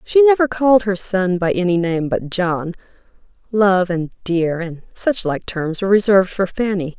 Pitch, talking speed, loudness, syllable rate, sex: 190 Hz, 180 wpm, -17 LUFS, 4.8 syllables/s, female